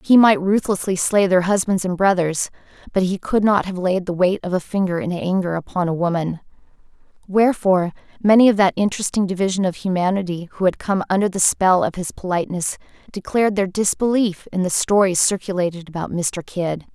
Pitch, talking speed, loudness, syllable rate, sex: 190 Hz, 180 wpm, -19 LUFS, 5.7 syllables/s, female